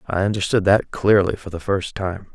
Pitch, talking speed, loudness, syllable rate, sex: 95 Hz, 205 wpm, -20 LUFS, 5.0 syllables/s, male